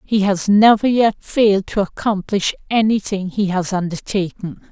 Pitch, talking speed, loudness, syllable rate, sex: 200 Hz, 140 wpm, -17 LUFS, 4.6 syllables/s, female